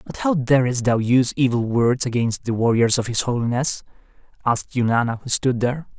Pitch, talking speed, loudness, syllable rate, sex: 125 Hz, 180 wpm, -20 LUFS, 5.7 syllables/s, male